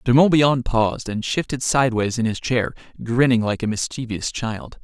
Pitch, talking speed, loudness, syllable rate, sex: 120 Hz, 175 wpm, -20 LUFS, 5.2 syllables/s, male